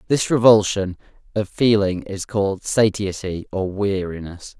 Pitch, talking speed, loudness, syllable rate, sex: 100 Hz, 120 wpm, -20 LUFS, 6.1 syllables/s, male